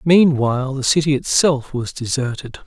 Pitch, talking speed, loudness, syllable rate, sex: 135 Hz, 135 wpm, -18 LUFS, 4.8 syllables/s, male